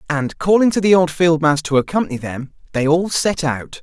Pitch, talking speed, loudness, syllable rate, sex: 160 Hz, 220 wpm, -17 LUFS, 5.5 syllables/s, male